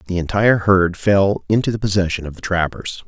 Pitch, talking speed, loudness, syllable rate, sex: 95 Hz, 195 wpm, -17 LUFS, 5.6 syllables/s, male